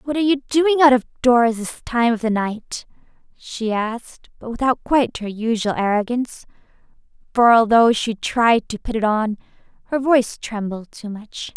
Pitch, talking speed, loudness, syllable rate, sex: 235 Hz, 170 wpm, -19 LUFS, 4.7 syllables/s, female